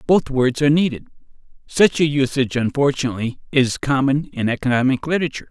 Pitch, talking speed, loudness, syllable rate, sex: 135 Hz, 140 wpm, -19 LUFS, 6.4 syllables/s, male